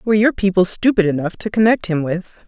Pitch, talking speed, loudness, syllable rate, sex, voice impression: 195 Hz, 220 wpm, -17 LUFS, 6.5 syllables/s, female, feminine, very adult-like, slightly cool, slightly calm